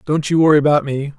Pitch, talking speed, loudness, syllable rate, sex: 145 Hz, 255 wpm, -15 LUFS, 6.7 syllables/s, male